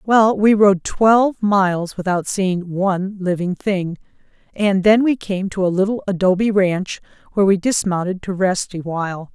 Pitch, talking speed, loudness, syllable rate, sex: 190 Hz, 165 wpm, -18 LUFS, 4.6 syllables/s, female